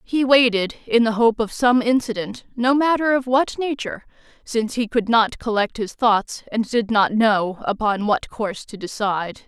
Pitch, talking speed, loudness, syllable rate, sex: 225 Hz, 185 wpm, -20 LUFS, 4.7 syllables/s, female